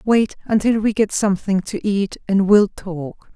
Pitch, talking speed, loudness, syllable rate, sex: 200 Hz, 180 wpm, -19 LUFS, 4.4 syllables/s, female